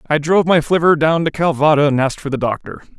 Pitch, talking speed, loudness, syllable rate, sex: 150 Hz, 240 wpm, -15 LUFS, 6.8 syllables/s, male